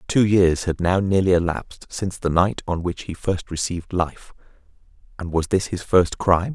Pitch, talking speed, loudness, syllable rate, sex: 90 Hz, 190 wpm, -21 LUFS, 5.1 syllables/s, male